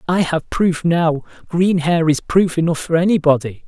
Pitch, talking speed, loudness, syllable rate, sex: 165 Hz, 165 wpm, -17 LUFS, 4.6 syllables/s, male